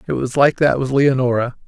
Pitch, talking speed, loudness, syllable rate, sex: 135 Hz, 215 wpm, -16 LUFS, 5.6 syllables/s, male